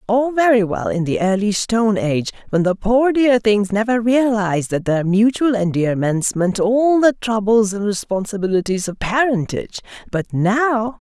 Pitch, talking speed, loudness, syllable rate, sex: 210 Hz, 150 wpm, -17 LUFS, 4.7 syllables/s, male